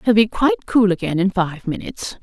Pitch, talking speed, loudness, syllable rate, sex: 200 Hz, 215 wpm, -19 LUFS, 6.1 syllables/s, female